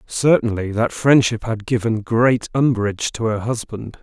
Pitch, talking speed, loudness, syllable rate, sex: 115 Hz, 150 wpm, -19 LUFS, 4.4 syllables/s, male